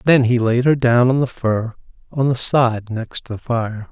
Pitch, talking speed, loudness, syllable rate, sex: 120 Hz, 215 wpm, -17 LUFS, 4.1 syllables/s, male